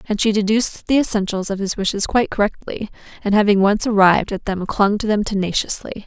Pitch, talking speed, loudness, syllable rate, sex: 205 Hz, 200 wpm, -18 LUFS, 6.1 syllables/s, female